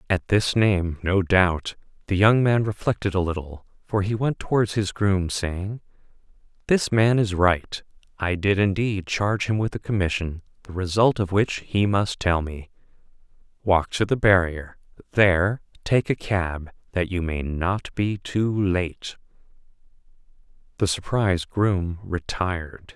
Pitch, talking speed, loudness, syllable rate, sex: 95 Hz, 150 wpm, -23 LUFS, 4.1 syllables/s, male